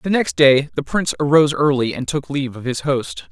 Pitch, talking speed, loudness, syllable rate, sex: 145 Hz, 235 wpm, -18 LUFS, 6.0 syllables/s, male